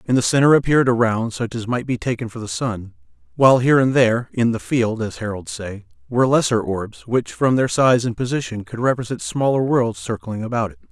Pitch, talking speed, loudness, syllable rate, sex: 120 Hz, 220 wpm, -19 LUFS, 5.7 syllables/s, male